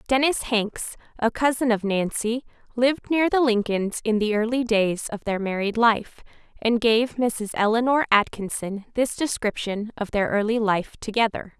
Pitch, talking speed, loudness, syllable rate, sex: 225 Hz, 155 wpm, -23 LUFS, 4.6 syllables/s, female